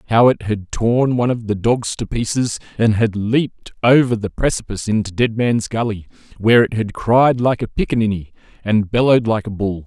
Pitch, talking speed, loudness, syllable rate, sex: 110 Hz, 195 wpm, -17 LUFS, 5.4 syllables/s, male